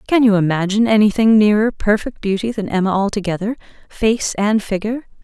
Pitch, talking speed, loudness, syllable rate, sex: 210 Hz, 150 wpm, -16 LUFS, 5.8 syllables/s, female